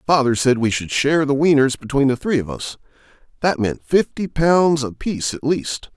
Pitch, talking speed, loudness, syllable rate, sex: 140 Hz, 200 wpm, -19 LUFS, 5.0 syllables/s, male